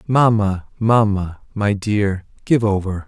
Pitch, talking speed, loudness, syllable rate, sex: 105 Hz, 115 wpm, -18 LUFS, 3.6 syllables/s, male